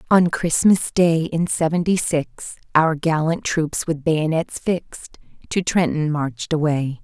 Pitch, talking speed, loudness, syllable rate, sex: 160 Hz, 135 wpm, -20 LUFS, 4.0 syllables/s, female